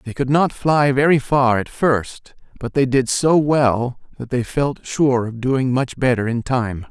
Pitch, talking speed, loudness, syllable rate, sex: 130 Hz, 200 wpm, -18 LUFS, 4.0 syllables/s, male